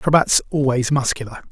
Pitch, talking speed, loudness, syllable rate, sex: 135 Hz, 120 wpm, -18 LUFS, 6.0 syllables/s, male